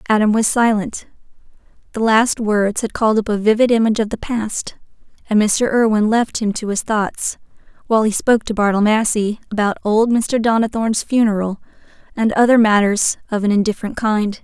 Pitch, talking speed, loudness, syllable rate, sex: 215 Hz, 170 wpm, -17 LUFS, 5.5 syllables/s, female